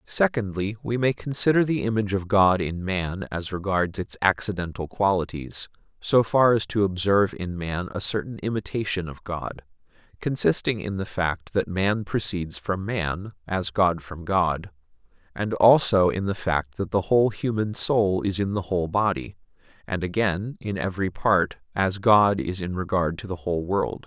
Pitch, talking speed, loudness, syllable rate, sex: 95 Hz, 170 wpm, -24 LUFS, 4.7 syllables/s, male